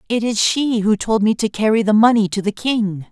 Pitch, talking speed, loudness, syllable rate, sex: 215 Hz, 250 wpm, -17 LUFS, 5.1 syllables/s, male